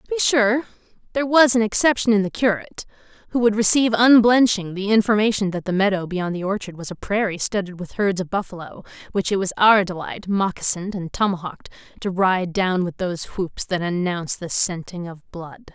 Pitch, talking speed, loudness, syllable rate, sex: 195 Hz, 190 wpm, -20 LUFS, 5.6 syllables/s, female